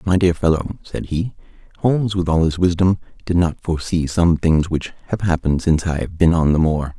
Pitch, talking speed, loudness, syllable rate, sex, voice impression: 85 Hz, 215 wpm, -19 LUFS, 5.7 syllables/s, male, very masculine, slightly old, very thick, very relaxed, very weak, slightly bright, very soft, very muffled, slightly halting, raspy, cool, very intellectual, slightly refreshing, very sincere, very calm, very mature, friendly, reassuring, very unique, slightly elegant, wild, lively, very kind, slightly modest